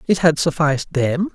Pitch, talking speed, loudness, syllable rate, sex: 160 Hz, 180 wpm, -18 LUFS, 5.1 syllables/s, male